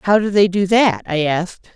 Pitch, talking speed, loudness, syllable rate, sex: 190 Hz, 240 wpm, -16 LUFS, 5.3 syllables/s, female